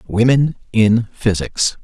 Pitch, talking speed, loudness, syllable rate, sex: 115 Hz, 100 wpm, -16 LUFS, 3.6 syllables/s, male